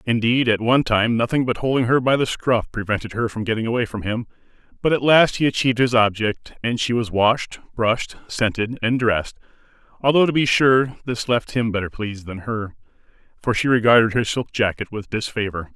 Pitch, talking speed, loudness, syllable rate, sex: 115 Hz, 200 wpm, -20 LUFS, 5.6 syllables/s, male